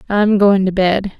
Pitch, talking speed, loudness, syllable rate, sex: 195 Hz, 200 wpm, -14 LUFS, 4.2 syllables/s, female